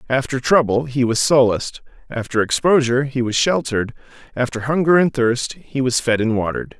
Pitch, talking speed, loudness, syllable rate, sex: 130 Hz, 170 wpm, -18 LUFS, 5.6 syllables/s, male